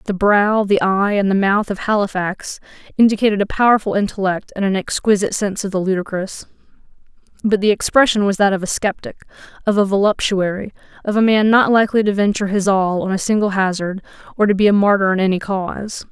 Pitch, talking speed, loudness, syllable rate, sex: 200 Hz, 195 wpm, -17 LUFS, 6.1 syllables/s, female